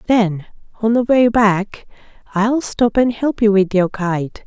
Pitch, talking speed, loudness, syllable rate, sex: 215 Hz, 175 wpm, -16 LUFS, 3.8 syllables/s, female